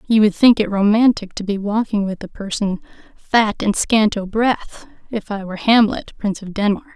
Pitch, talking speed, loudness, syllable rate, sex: 210 Hz, 200 wpm, -18 LUFS, 5.1 syllables/s, female